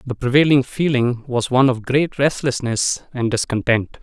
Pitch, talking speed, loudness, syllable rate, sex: 130 Hz, 150 wpm, -18 LUFS, 4.7 syllables/s, male